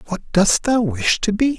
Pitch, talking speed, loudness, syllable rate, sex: 200 Hz, 225 wpm, -18 LUFS, 4.8 syllables/s, male